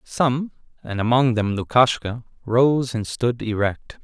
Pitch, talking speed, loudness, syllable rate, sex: 120 Hz, 135 wpm, -21 LUFS, 3.8 syllables/s, male